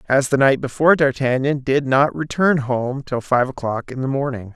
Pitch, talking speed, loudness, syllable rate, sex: 135 Hz, 200 wpm, -19 LUFS, 5.0 syllables/s, male